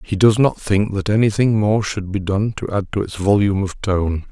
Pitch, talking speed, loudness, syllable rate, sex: 100 Hz, 235 wpm, -18 LUFS, 5.0 syllables/s, male